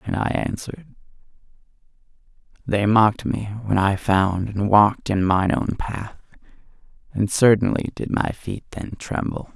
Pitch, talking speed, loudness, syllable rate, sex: 105 Hz, 140 wpm, -21 LUFS, 4.4 syllables/s, male